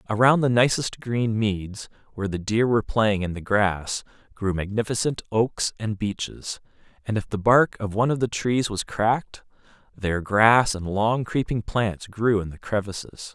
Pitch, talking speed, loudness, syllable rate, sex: 110 Hz, 175 wpm, -23 LUFS, 4.6 syllables/s, male